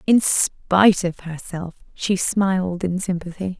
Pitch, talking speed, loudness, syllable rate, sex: 180 Hz, 135 wpm, -20 LUFS, 4.0 syllables/s, female